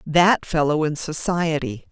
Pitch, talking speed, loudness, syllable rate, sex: 155 Hz, 125 wpm, -21 LUFS, 4.0 syllables/s, female